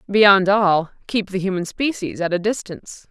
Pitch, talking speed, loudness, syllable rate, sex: 195 Hz, 175 wpm, -19 LUFS, 4.7 syllables/s, female